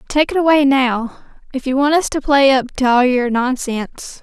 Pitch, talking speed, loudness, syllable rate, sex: 265 Hz, 215 wpm, -15 LUFS, 4.8 syllables/s, female